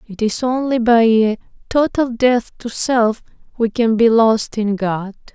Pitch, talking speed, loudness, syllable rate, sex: 230 Hz, 170 wpm, -16 LUFS, 3.6 syllables/s, female